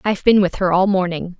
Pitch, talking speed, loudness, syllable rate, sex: 185 Hz, 260 wpm, -17 LUFS, 6.2 syllables/s, female